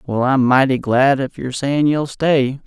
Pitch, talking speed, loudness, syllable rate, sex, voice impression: 135 Hz, 205 wpm, -16 LUFS, 4.4 syllables/s, male, masculine, adult-like, slightly cool, calm, slightly friendly, slightly kind